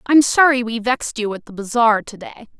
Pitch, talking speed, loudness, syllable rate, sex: 235 Hz, 230 wpm, -17 LUFS, 5.4 syllables/s, female